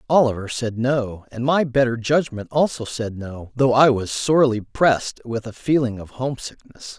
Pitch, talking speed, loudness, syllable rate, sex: 125 Hz, 170 wpm, -20 LUFS, 4.8 syllables/s, male